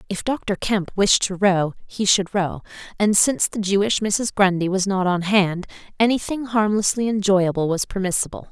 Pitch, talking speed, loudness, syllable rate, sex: 200 Hz, 170 wpm, -20 LUFS, 4.9 syllables/s, female